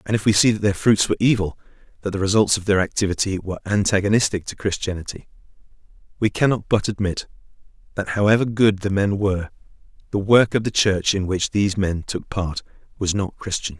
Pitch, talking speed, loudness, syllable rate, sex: 100 Hz, 185 wpm, -20 LUFS, 6.1 syllables/s, male